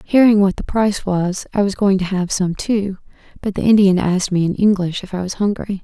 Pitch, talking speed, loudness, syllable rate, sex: 195 Hz, 235 wpm, -17 LUFS, 5.5 syllables/s, female